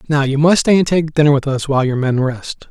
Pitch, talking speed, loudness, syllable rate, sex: 145 Hz, 290 wpm, -15 LUFS, 6.0 syllables/s, male